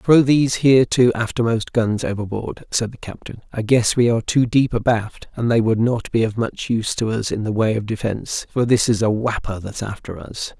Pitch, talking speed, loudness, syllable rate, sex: 115 Hz, 225 wpm, -19 LUFS, 5.3 syllables/s, male